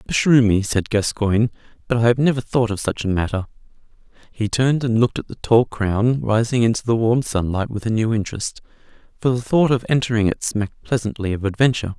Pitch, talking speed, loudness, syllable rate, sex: 115 Hz, 200 wpm, -19 LUFS, 6.0 syllables/s, male